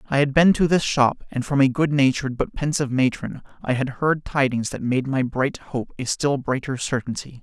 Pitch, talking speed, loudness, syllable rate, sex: 135 Hz, 210 wpm, -22 LUFS, 5.2 syllables/s, male